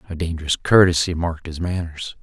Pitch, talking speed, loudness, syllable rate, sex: 85 Hz, 160 wpm, -20 LUFS, 6.0 syllables/s, male